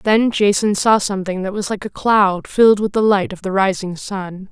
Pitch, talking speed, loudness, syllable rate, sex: 200 Hz, 225 wpm, -17 LUFS, 5.0 syllables/s, female